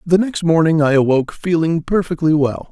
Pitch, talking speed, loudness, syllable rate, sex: 160 Hz, 175 wpm, -16 LUFS, 5.4 syllables/s, male